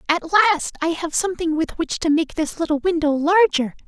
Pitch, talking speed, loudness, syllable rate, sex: 300 Hz, 200 wpm, -20 LUFS, 5.6 syllables/s, male